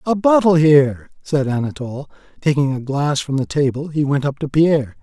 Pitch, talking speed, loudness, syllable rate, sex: 145 Hz, 190 wpm, -17 LUFS, 5.4 syllables/s, male